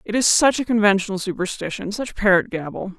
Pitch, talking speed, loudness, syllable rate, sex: 205 Hz, 180 wpm, -20 LUFS, 5.9 syllables/s, female